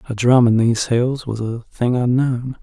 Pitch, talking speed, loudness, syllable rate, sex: 120 Hz, 205 wpm, -18 LUFS, 4.7 syllables/s, male